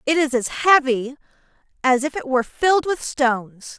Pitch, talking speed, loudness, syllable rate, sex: 275 Hz, 175 wpm, -19 LUFS, 5.0 syllables/s, female